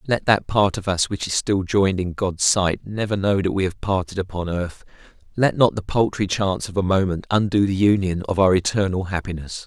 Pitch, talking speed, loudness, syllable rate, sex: 95 Hz, 215 wpm, -21 LUFS, 5.4 syllables/s, male